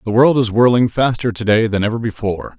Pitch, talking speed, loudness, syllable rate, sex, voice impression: 115 Hz, 230 wpm, -16 LUFS, 6.1 syllables/s, male, masculine, adult-like, slightly thick, slightly fluent, cool, slightly intellectual